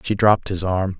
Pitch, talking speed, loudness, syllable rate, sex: 95 Hz, 240 wpm, -19 LUFS, 5.6 syllables/s, male